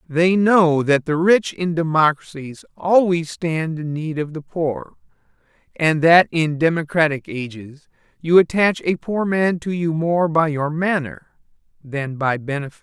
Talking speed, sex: 160 wpm, male